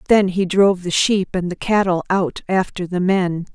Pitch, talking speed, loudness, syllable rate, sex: 185 Hz, 205 wpm, -18 LUFS, 4.7 syllables/s, female